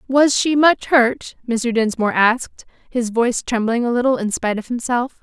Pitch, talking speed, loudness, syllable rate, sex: 240 Hz, 185 wpm, -18 LUFS, 5.1 syllables/s, female